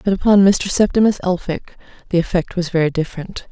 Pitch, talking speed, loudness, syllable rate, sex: 185 Hz, 170 wpm, -17 LUFS, 5.9 syllables/s, female